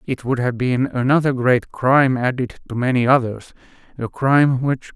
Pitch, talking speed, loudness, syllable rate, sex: 130 Hz, 155 wpm, -18 LUFS, 4.9 syllables/s, male